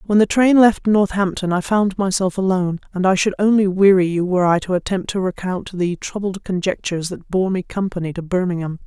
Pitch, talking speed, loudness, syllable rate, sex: 190 Hz, 205 wpm, -18 LUFS, 5.6 syllables/s, female